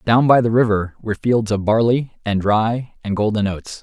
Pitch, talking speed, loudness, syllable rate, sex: 110 Hz, 205 wpm, -18 LUFS, 4.8 syllables/s, male